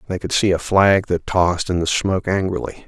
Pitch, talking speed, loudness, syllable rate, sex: 90 Hz, 230 wpm, -18 LUFS, 5.6 syllables/s, male